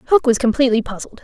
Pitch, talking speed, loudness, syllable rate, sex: 250 Hz, 195 wpm, -16 LUFS, 6.7 syllables/s, female